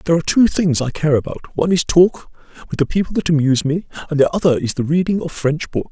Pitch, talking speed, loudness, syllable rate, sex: 160 Hz, 245 wpm, -17 LUFS, 6.2 syllables/s, male